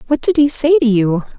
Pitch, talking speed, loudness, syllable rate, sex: 250 Hz, 260 wpm, -13 LUFS, 6.0 syllables/s, female